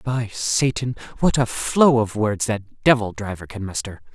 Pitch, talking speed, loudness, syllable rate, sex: 115 Hz, 175 wpm, -21 LUFS, 4.4 syllables/s, male